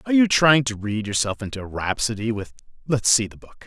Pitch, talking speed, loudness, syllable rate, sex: 115 Hz, 215 wpm, -21 LUFS, 5.9 syllables/s, male